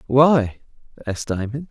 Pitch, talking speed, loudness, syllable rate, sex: 125 Hz, 105 wpm, -20 LUFS, 4.6 syllables/s, male